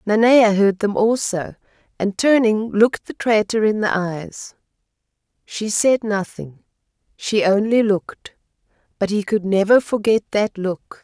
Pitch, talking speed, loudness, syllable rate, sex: 210 Hz, 135 wpm, -18 LUFS, 4.2 syllables/s, female